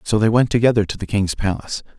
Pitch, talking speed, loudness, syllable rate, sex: 110 Hz, 240 wpm, -19 LUFS, 6.8 syllables/s, male